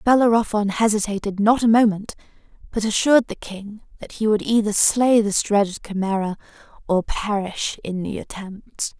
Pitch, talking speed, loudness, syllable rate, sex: 210 Hz, 145 wpm, -20 LUFS, 4.9 syllables/s, female